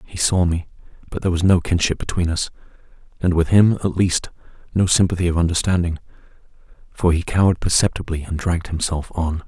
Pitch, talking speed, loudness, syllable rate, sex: 85 Hz, 170 wpm, -19 LUFS, 6.1 syllables/s, male